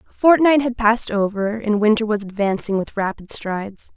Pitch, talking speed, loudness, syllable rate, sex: 215 Hz, 180 wpm, -19 LUFS, 5.4 syllables/s, female